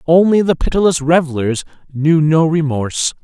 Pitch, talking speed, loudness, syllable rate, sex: 155 Hz, 130 wpm, -14 LUFS, 5.0 syllables/s, male